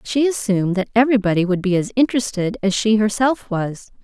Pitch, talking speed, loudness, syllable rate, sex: 215 Hz, 180 wpm, -18 LUFS, 5.9 syllables/s, female